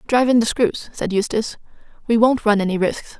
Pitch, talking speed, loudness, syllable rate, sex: 220 Hz, 205 wpm, -19 LUFS, 6.0 syllables/s, female